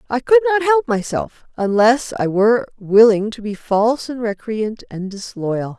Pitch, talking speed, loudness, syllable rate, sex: 230 Hz, 165 wpm, -17 LUFS, 5.0 syllables/s, female